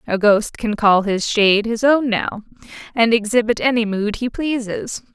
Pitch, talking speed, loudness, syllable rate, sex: 225 Hz, 175 wpm, -17 LUFS, 4.5 syllables/s, female